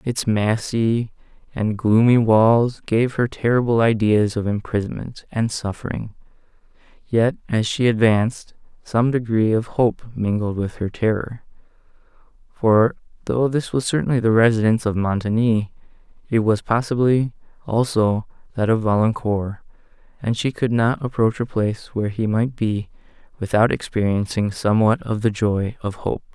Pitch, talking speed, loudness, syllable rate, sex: 110 Hz, 135 wpm, -20 LUFS, 4.6 syllables/s, male